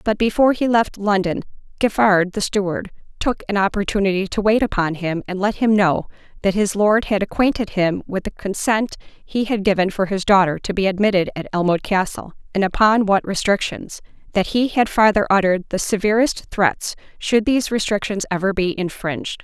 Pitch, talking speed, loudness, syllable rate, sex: 200 Hz, 180 wpm, -19 LUFS, 5.4 syllables/s, female